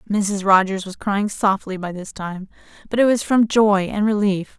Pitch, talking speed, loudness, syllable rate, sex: 200 Hz, 195 wpm, -19 LUFS, 4.5 syllables/s, female